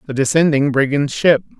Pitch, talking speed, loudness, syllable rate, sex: 145 Hz, 150 wpm, -15 LUFS, 5.4 syllables/s, male